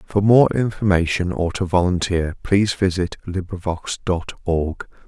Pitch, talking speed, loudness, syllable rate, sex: 90 Hz, 130 wpm, -20 LUFS, 4.4 syllables/s, male